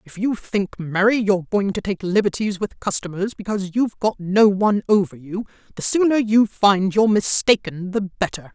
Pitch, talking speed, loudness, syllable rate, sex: 200 Hz, 185 wpm, -20 LUFS, 5.2 syllables/s, female